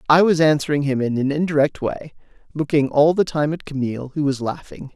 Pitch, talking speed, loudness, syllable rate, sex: 145 Hz, 205 wpm, -19 LUFS, 5.8 syllables/s, male